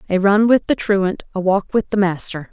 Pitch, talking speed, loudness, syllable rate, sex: 195 Hz, 240 wpm, -17 LUFS, 5.0 syllables/s, female